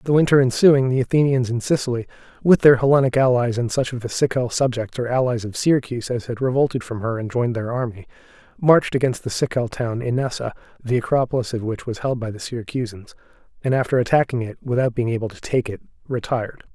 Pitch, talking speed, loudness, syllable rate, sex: 125 Hz, 200 wpm, -20 LUFS, 6.4 syllables/s, male